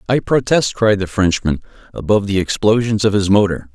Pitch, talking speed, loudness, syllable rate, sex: 105 Hz, 175 wpm, -16 LUFS, 5.6 syllables/s, male